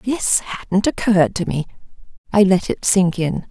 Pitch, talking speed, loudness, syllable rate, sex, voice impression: 190 Hz, 170 wpm, -18 LUFS, 4.3 syllables/s, female, feminine, middle-aged, tensed, powerful, bright, raspy, friendly, slightly reassuring, elegant, lively, slightly strict, sharp